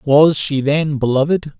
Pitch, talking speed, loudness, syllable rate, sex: 145 Hz, 150 wpm, -15 LUFS, 4.0 syllables/s, male